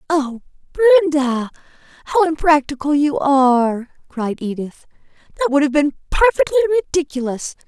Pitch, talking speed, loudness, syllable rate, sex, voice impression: 300 Hz, 110 wpm, -17 LUFS, 5.1 syllables/s, female, feminine, slightly adult-like, slightly powerful, slightly fluent, slightly sincere